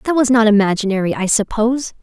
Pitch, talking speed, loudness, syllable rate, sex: 225 Hz, 180 wpm, -15 LUFS, 6.5 syllables/s, female